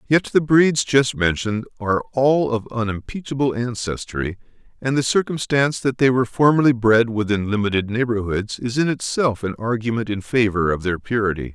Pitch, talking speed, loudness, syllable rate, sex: 115 Hz, 160 wpm, -20 LUFS, 5.3 syllables/s, male